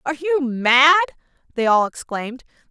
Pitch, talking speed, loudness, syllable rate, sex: 275 Hz, 135 wpm, -18 LUFS, 5.3 syllables/s, female